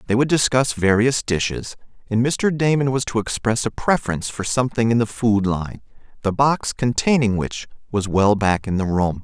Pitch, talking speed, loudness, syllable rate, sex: 115 Hz, 190 wpm, -20 LUFS, 5.1 syllables/s, male